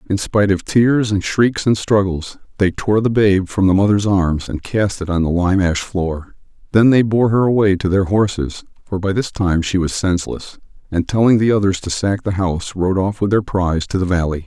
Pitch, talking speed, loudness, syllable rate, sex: 95 Hz, 230 wpm, -17 LUFS, 4.7 syllables/s, male